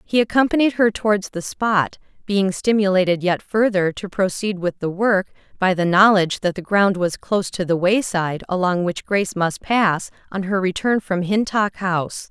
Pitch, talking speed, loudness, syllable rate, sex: 195 Hz, 185 wpm, -19 LUFS, 4.8 syllables/s, female